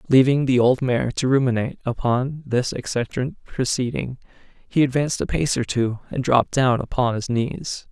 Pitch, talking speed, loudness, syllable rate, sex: 125 Hz, 165 wpm, -21 LUFS, 4.9 syllables/s, male